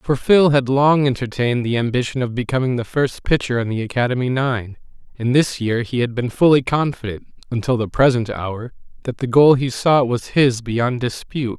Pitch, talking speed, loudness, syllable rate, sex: 125 Hz, 190 wpm, -18 LUFS, 5.2 syllables/s, male